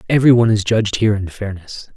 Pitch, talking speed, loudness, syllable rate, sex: 105 Hz, 215 wpm, -16 LUFS, 7.5 syllables/s, male